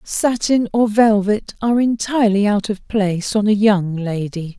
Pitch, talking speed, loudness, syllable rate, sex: 210 Hz, 155 wpm, -17 LUFS, 4.6 syllables/s, female